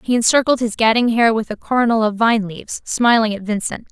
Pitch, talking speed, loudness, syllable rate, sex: 225 Hz, 200 wpm, -17 LUFS, 6.1 syllables/s, female